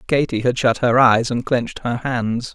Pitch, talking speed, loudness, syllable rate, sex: 125 Hz, 210 wpm, -18 LUFS, 4.6 syllables/s, male